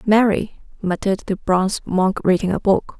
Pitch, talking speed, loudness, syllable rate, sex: 195 Hz, 160 wpm, -19 LUFS, 5.0 syllables/s, female